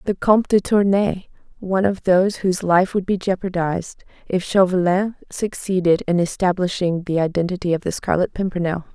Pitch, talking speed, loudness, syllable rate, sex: 185 Hz, 150 wpm, -20 LUFS, 5.5 syllables/s, female